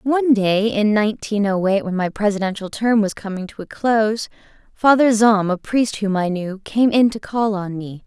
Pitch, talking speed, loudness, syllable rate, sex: 210 Hz, 210 wpm, -18 LUFS, 4.9 syllables/s, female